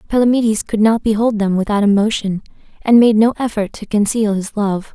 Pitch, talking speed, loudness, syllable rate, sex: 215 Hz, 180 wpm, -15 LUFS, 5.5 syllables/s, female